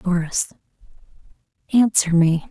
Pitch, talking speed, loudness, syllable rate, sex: 180 Hz, 70 wpm, -19 LUFS, 4.0 syllables/s, female